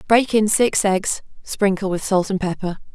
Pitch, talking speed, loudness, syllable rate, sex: 195 Hz, 185 wpm, -19 LUFS, 4.4 syllables/s, female